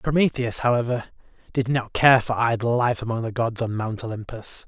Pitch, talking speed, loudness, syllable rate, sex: 120 Hz, 180 wpm, -23 LUFS, 5.3 syllables/s, male